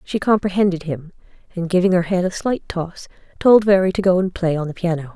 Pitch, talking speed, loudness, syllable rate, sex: 180 Hz, 220 wpm, -18 LUFS, 5.8 syllables/s, female